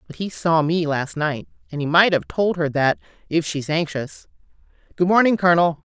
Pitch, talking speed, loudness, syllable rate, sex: 165 Hz, 185 wpm, -20 LUFS, 5.1 syllables/s, female